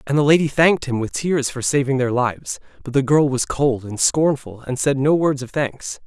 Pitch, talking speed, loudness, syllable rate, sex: 135 Hz, 235 wpm, -19 LUFS, 5.1 syllables/s, male